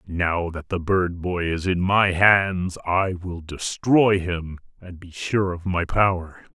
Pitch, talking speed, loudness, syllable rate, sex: 90 Hz, 175 wpm, -22 LUFS, 3.6 syllables/s, male